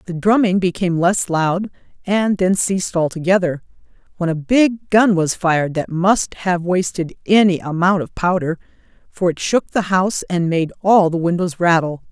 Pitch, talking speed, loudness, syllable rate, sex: 180 Hz, 170 wpm, -17 LUFS, 4.8 syllables/s, female